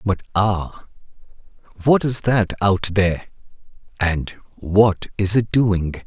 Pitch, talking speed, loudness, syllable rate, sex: 100 Hz, 120 wpm, -19 LUFS, 3.6 syllables/s, male